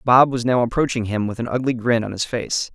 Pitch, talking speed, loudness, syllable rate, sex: 120 Hz, 265 wpm, -20 LUFS, 5.7 syllables/s, male